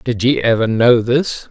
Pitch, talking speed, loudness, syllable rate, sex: 120 Hz, 200 wpm, -14 LUFS, 4.1 syllables/s, male